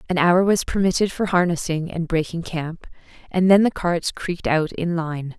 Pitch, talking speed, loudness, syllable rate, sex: 175 Hz, 190 wpm, -21 LUFS, 4.8 syllables/s, female